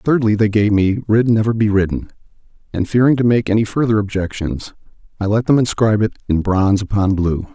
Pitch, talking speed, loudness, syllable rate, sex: 105 Hz, 190 wpm, -16 LUFS, 5.9 syllables/s, male